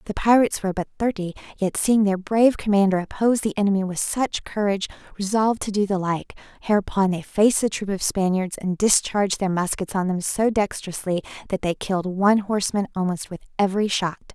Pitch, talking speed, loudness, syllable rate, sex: 200 Hz, 190 wpm, -22 LUFS, 6.1 syllables/s, female